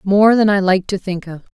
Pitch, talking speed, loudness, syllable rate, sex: 195 Hz, 270 wpm, -15 LUFS, 5.2 syllables/s, female